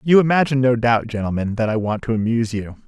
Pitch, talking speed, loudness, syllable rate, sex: 120 Hz, 230 wpm, -19 LUFS, 6.6 syllables/s, male